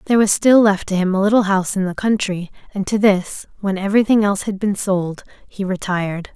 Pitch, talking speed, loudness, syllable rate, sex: 200 Hz, 215 wpm, -18 LUFS, 5.9 syllables/s, female